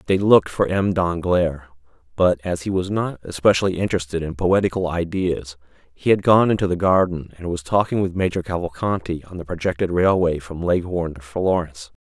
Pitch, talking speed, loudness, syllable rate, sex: 90 Hz, 175 wpm, -20 LUFS, 5.5 syllables/s, male